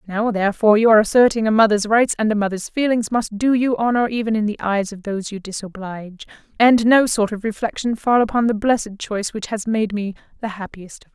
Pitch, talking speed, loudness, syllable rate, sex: 215 Hz, 220 wpm, -18 LUFS, 5.9 syllables/s, female